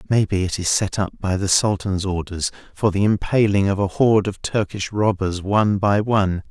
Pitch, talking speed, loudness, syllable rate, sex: 100 Hz, 195 wpm, -20 LUFS, 5.1 syllables/s, male